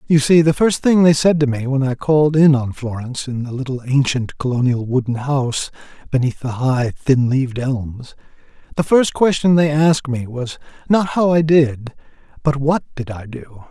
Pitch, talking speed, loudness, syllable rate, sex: 135 Hz, 190 wpm, -17 LUFS, 5.0 syllables/s, male